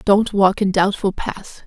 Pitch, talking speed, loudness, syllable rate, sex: 195 Hz, 180 wpm, -18 LUFS, 3.9 syllables/s, female